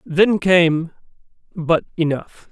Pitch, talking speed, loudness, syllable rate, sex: 170 Hz, 70 wpm, -17 LUFS, 3.0 syllables/s, male